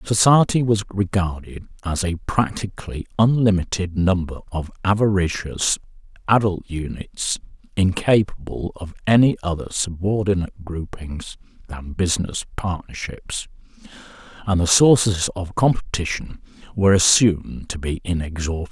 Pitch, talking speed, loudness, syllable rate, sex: 95 Hz, 100 wpm, -21 LUFS, 4.8 syllables/s, male